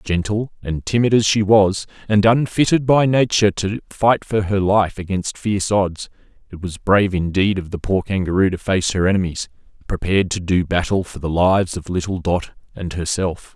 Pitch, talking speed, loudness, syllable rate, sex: 95 Hz, 185 wpm, -18 LUFS, 5.1 syllables/s, male